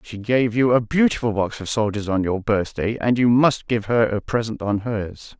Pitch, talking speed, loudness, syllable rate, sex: 110 Hz, 225 wpm, -20 LUFS, 4.8 syllables/s, male